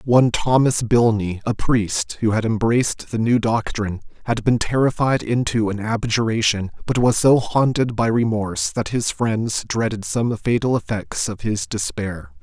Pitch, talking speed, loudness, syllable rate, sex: 115 Hz, 160 wpm, -20 LUFS, 4.5 syllables/s, male